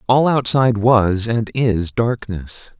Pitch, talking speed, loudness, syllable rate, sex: 110 Hz, 130 wpm, -17 LUFS, 3.5 syllables/s, male